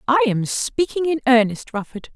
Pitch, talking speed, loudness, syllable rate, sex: 255 Hz, 165 wpm, -20 LUFS, 4.7 syllables/s, female